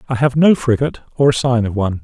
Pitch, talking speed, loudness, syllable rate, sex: 125 Hz, 265 wpm, -15 LUFS, 6.8 syllables/s, male